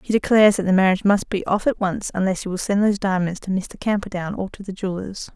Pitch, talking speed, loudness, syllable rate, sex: 195 Hz, 260 wpm, -21 LUFS, 6.5 syllables/s, female